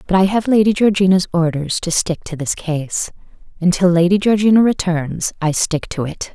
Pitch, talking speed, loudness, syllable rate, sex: 180 Hz, 190 wpm, -16 LUFS, 5.1 syllables/s, female